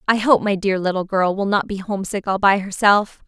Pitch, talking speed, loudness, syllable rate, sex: 195 Hz, 240 wpm, -19 LUFS, 5.5 syllables/s, female